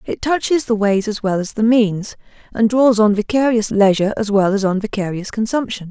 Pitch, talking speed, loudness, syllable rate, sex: 215 Hz, 205 wpm, -17 LUFS, 5.4 syllables/s, female